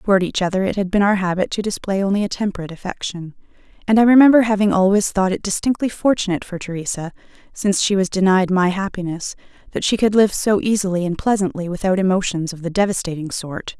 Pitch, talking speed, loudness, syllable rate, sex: 195 Hz, 195 wpm, -18 LUFS, 6.5 syllables/s, female